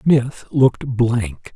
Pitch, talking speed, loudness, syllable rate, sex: 120 Hz, 115 wpm, -18 LUFS, 2.8 syllables/s, male